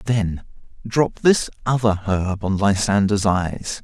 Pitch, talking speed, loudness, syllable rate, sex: 105 Hz, 125 wpm, -20 LUFS, 3.5 syllables/s, male